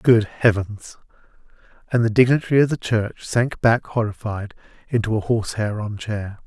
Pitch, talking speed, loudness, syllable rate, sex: 110 Hz, 150 wpm, -21 LUFS, 4.9 syllables/s, male